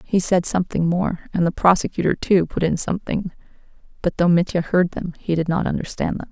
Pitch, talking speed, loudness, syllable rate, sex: 175 Hz, 200 wpm, -20 LUFS, 5.8 syllables/s, female